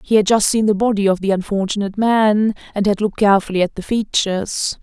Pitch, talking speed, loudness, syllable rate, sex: 205 Hz, 210 wpm, -17 LUFS, 6.2 syllables/s, female